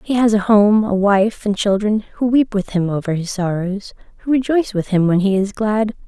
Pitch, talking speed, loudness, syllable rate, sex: 205 Hz, 225 wpm, -17 LUFS, 5.0 syllables/s, female